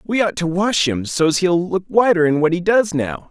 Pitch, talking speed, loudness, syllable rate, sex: 175 Hz, 235 wpm, -17 LUFS, 4.9 syllables/s, male